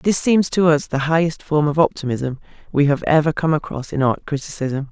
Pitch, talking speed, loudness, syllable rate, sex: 150 Hz, 205 wpm, -19 LUFS, 5.3 syllables/s, female